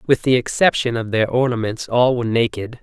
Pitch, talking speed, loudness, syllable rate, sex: 120 Hz, 190 wpm, -18 LUFS, 5.6 syllables/s, male